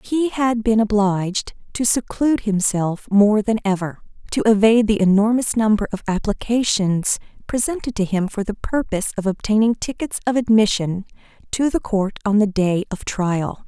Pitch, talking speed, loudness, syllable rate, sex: 210 Hz, 160 wpm, -19 LUFS, 5.0 syllables/s, female